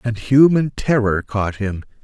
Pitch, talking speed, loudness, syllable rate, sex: 115 Hz, 150 wpm, -17 LUFS, 3.9 syllables/s, male